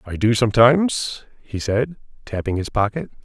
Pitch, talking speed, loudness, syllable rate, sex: 115 Hz, 150 wpm, -20 LUFS, 5.0 syllables/s, male